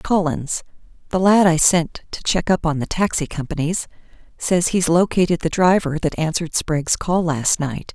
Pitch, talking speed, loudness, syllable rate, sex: 165 Hz, 160 wpm, -19 LUFS, 4.8 syllables/s, female